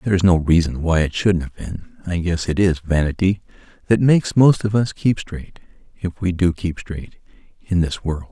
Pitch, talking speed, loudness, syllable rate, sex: 90 Hz, 210 wpm, -19 LUFS, 5.1 syllables/s, male